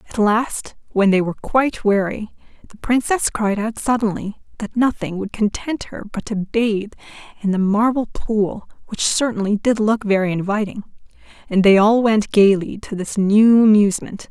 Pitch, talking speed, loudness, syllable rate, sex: 215 Hz, 165 wpm, -18 LUFS, 4.8 syllables/s, female